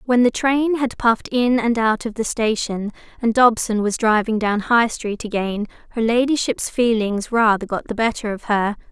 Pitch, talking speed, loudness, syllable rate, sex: 225 Hz, 190 wpm, -19 LUFS, 4.8 syllables/s, female